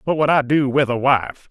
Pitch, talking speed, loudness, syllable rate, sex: 135 Hz, 280 wpm, -17 LUFS, 5.0 syllables/s, male